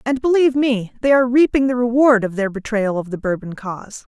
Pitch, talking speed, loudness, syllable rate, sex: 235 Hz, 215 wpm, -17 LUFS, 5.9 syllables/s, female